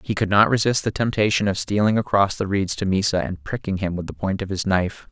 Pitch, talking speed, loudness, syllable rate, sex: 100 Hz, 260 wpm, -21 LUFS, 6.0 syllables/s, male